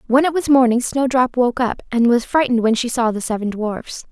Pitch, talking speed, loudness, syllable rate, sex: 245 Hz, 235 wpm, -17 LUFS, 5.4 syllables/s, female